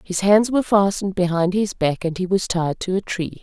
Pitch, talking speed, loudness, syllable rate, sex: 190 Hz, 245 wpm, -20 LUFS, 5.4 syllables/s, female